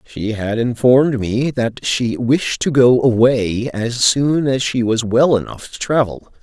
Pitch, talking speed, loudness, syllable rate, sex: 120 Hz, 175 wpm, -16 LUFS, 3.9 syllables/s, male